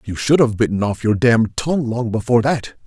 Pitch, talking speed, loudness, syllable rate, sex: 115 Hz, 210 wpm, -17 LUFS, 5.9 syllables/s, male